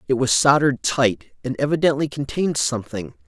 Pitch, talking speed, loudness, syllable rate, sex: 135 Hz, 145 wpm, -20 LUFS, 5.8 syllables/s, male